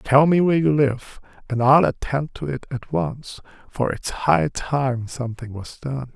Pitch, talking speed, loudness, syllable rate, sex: 130 Hz, 185 wpm, -21 LUFS, 4.2 syllables/s, male